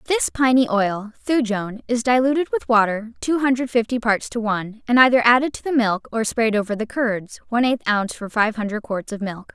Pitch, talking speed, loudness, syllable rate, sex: 230 Hz, 215 wpm, -20 LUFS, 5.6 syllables/s, female